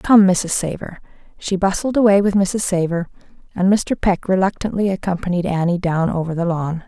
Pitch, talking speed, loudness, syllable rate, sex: 185 Hz, 165 wpm, -18 LUFS, 5.2 syllables/s, female